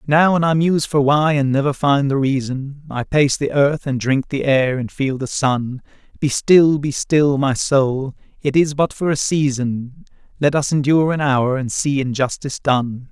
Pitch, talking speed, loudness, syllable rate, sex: 140 Hz, 200 wpm, -18 LUFS, 4.4 syllables/s, male